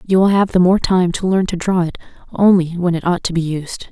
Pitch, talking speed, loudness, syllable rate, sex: 180 Hz, 275 wpm, -16 LUFS, 5.5 syllables/s, female